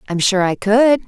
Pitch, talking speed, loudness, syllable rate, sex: 215 Hz, 225 wpm, -15 LUFS, 4.8 syllables/s, female